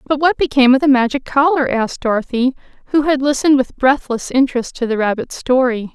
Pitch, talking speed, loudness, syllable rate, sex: 260 Hz, 190 wpm, -15 LUFS, 6.0 syllables/s, female